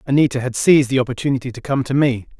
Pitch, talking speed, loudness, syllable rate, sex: 130 Hz, 225 wpm, -18 LUFS, 7.3 syllables/s, male